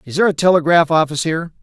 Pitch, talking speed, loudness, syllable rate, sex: 165 Hz, 220 wpm, -15 LUFS, 8.2 syllables/s, male